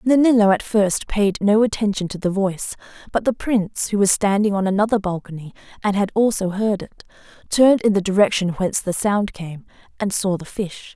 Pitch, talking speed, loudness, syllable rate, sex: 200 Hz, 190 wpm, -19 LUFS, 5.5 syllables/s, female